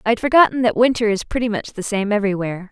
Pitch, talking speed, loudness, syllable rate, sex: 215 Hz, 245 wpm, -18 LUFS, 7.3 syllables/s, female